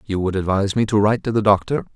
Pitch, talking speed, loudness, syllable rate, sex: 105 Hz, 275 wpm, -19 LUFS, 7.3 syllables/s, male